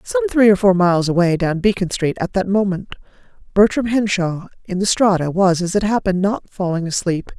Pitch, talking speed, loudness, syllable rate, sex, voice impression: 190 Hz, 195 wpm, -17 LUFS, 5.4 syllables/s, female, feminine, adult-like, thick, slightly relaxed, powerful, muffled, slightly raspy, intellectual, friendly, lively, slightly intense, slightly sharp